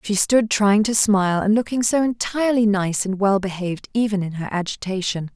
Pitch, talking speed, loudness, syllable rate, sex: 205 Hz, 190 wpm, -20 LUFS, 5.4 syllables/s, female